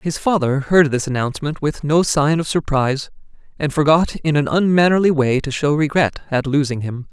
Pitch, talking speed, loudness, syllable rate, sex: 150 Hz, 185 wpm, -17 LUFS, 5.3 syllables/s, male